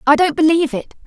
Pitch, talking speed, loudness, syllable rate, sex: 305 Hz, 225 wpm, -15 LUFS, 7.1 syllables/s, female